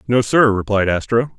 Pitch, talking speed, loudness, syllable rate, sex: 115 Hz, 175 wpm, -16 LUFS, 4.9 syllables/s, male